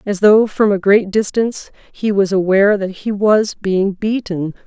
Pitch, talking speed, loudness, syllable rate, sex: 200 Hz, 180 wpm, -15 LUFS, 4.5 syllables/s, female